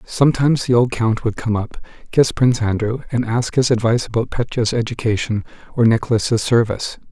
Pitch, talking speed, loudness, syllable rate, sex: 115 Hz, 170 wpm, -18 LUFS, 5.8 syllables/s, male